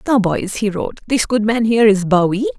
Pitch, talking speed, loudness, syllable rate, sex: 215 Hz, 230 wpm, -16 LUFS, 5.8 syllables/s, female